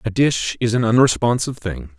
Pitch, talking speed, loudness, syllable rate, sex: 110 Hz, 180 wpm, -18 LUFS, 5.4 syllables/s, male